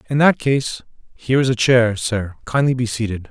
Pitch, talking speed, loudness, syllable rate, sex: 120 Hz, 200 wpm, -18 LUFS, 5.1 syllables/s, male